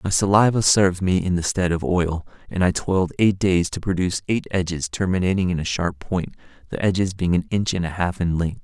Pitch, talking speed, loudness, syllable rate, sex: 90 Hz, 230 wpm, -21 LUFS, 5.8 syllables/s, male